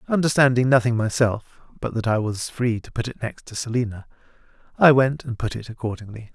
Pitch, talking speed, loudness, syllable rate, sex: 120 Hz, 190 wpm, -22 LUFS, 5.7 syllables/s, male